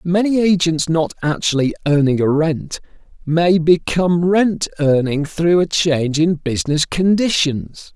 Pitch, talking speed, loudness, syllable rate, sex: 165 Hz, 130 wpm, -16 LUFS, 4.2 syllables/s, male